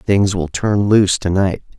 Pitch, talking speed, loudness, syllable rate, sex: 95 Hz, 200 wpm, -16 LUFS, 4.3 syllables/s, male